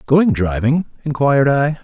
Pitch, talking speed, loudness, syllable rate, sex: 140 Hz, 130 wpm, -16 LUFS, 4.7 syllables/s, male